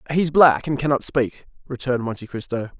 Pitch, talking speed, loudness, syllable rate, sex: 135 Hz, 195 wpm, -21 LUFS, 6.1 syllables/s, male